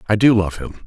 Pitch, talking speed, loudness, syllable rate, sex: 100 Hz, 275 wpm, -17 LUFS, 5.9 syllables/s, male